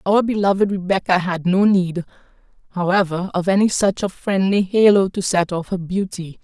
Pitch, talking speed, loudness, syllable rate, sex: 190 Hz, 170 wpm, -18 LUFS, 5.1 syllables/s, female